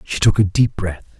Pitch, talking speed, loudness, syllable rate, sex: 100 Hz, 250 wpm, -18 LUFS, 5.1 syllables/s, male